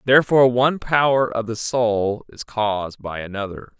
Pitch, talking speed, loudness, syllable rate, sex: 115 Hz, 160 wpm, -20 LUFS, 5.0 syllables/s, male